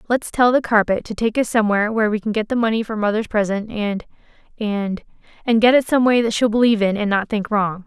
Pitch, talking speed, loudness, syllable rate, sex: 220 Hz, 230 wpm, -18 LUFS, 6.2 syllables/s, female